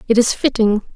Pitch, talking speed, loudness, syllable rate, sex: 225 Hz, 190 wpm, -16 LUFS, 5.5 syllables/s, female